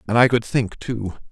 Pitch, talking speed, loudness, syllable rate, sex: 115 Hz, 230 wpm, -21 LUFS, 5.1 syllables/s, male